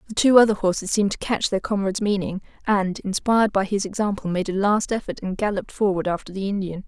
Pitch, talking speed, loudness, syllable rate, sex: 200 Hz, 220 wpm, -22 LUFS, 6.4 syllables/s, female